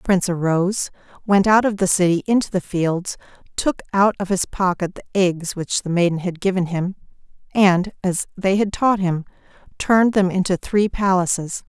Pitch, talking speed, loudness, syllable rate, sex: 185 Hz, 180 wpm, -19 LUFS, 5.2 syllables/s, female